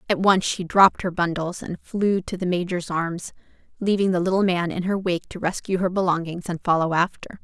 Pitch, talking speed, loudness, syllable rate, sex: 180 Hz, 210 wpm, -23 LUFS, 5.4 syllables/s, female